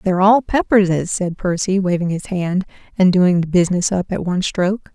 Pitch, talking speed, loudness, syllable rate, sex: 185 Hz, 195 wpm, -17 LUFS, 5.6 syllables/s, female